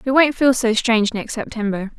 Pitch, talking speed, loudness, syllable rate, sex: 230 Hz, 210 wpm, -18 LUFS, 5.5 syllables/s, female